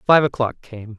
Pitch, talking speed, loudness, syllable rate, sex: 125 Hz, 185 wpm, -19 LUFS, 4.7 syllables/s, male